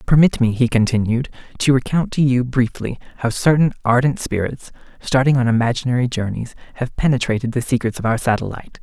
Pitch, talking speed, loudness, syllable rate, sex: 125 Hz, 165 wpm, -18 LUFS, 6.0 syllables/s, male